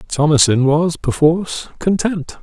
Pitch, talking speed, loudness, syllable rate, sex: 160 Hz, 100 wpm, -16 LUFS, 4.2 syllables/s, male